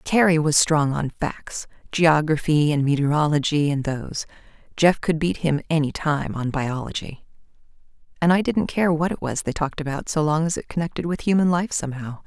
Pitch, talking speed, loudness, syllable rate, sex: 155 Hz, 175 wpm, -22 LUFS, 5.3 syllables/s, female